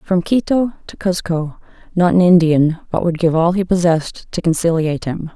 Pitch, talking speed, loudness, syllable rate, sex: 170 Hz, 180 wpm, -16 LUFS, 5.1 syllables/s, female